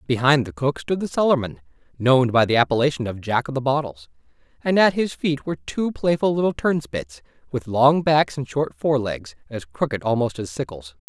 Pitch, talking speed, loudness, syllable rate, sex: 125 Hz, 190 wpm, -21 LUFS, 5.4 syllables/s, male